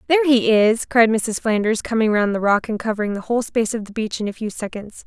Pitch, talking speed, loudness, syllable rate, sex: 215 Hz, 260 wpm, -19 LUFS, 6.1 syllables/s, female